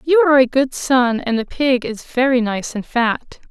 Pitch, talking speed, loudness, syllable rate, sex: 260 Hz, 225 wpm, -17 LUFS, 4.5 syllables/s, female